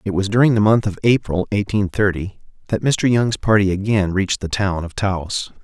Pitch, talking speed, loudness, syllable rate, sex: 100 Hz, 200 wpm, -18 LUFS, 5.1 syllables/s, male